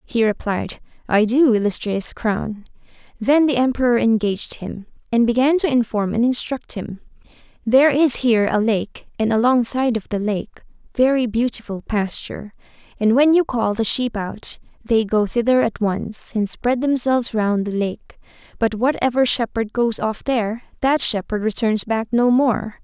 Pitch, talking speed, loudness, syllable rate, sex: 230 Hz, 160 wpm, -19 LUFS, 4.7 syllables/s, female